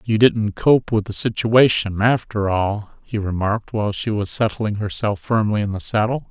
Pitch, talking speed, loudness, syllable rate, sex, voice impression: 110 Hz, 180 wpm, -19 LUFS, 4.8 syllables/s, male, masculine, middle-aged, relaxed, slightly dark, slightly muffled, halting, calm, mature, slightly friendly, reassuring, wild, slightly strict, modest